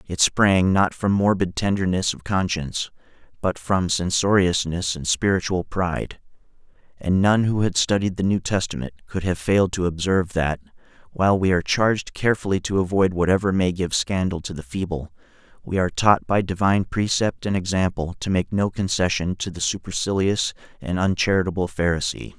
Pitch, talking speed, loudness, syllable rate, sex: 95 Hz, 160 wpm, -22 LUFS, 5.4 syllables/s, male